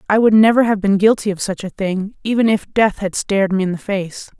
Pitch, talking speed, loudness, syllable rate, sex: 200 Hz, 260 wpm, -16 LUFS, 5.6 syllables/s, female